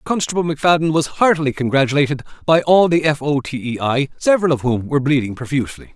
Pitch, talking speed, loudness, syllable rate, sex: 145 Hz, 190 wpm, -17 LUFS, 6.6 syllables/s, male